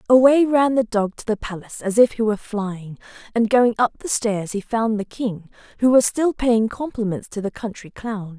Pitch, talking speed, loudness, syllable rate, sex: 220 Hz, 215 wpm, -20 LUFS, 5.0 syllables/s, female